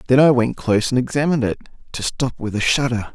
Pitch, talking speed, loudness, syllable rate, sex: 125 Hz, 230 wpm, -19 LUFS, 6.5 syllables/s, male